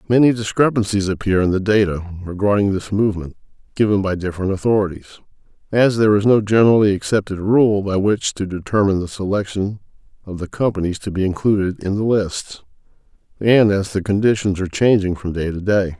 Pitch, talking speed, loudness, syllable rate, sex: 100 Hz, 170 wpm, -18 LUFS, 6.0 syllables/s, male